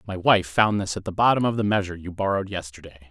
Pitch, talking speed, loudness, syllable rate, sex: 95 Hz, 250 wpm, -23 LUFS, 7.1 syllables/s, male